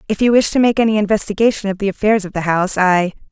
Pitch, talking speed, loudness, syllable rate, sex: 205 Hz, 255 wpm, -15 LUFS, 7.1 syllables/s, female